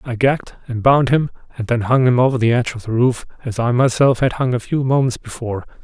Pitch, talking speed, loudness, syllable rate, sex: 125 Hz, 245 wpm, -17 LUFS, 6.1 syllables/s, male